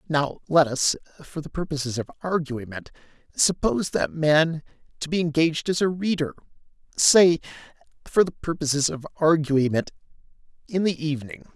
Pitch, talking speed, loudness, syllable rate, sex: 155 Hz, 135 wpm, -23 LUFS, 3.5 syllables/s, male